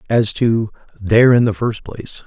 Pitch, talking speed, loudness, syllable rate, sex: 110 Hz, 185 wpm, -16 LUFS, 4.8 syllables/s, male